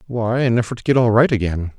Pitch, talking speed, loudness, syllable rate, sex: 115 Hz, 270 wpm, -17 LUFS, 6.3 syllables/s, male